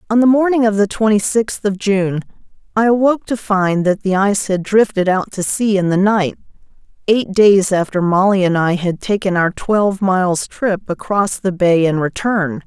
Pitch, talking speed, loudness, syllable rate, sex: 195 Hz, 195 wpm, -15 LUFS, 4.8 syllables/s, female